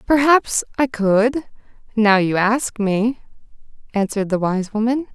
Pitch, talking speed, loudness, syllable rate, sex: 225 Hz, 130 wpm, -18 LUFS, 4.1 syllables/s, female